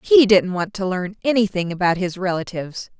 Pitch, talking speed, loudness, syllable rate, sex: 195 Hz, 180 wpm, -20 LUFS, 5.5 syllables/s, female